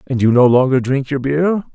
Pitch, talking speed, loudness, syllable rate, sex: 140 Hz, 240 wpm, -15 LUFS, 5.2 syllables/s, male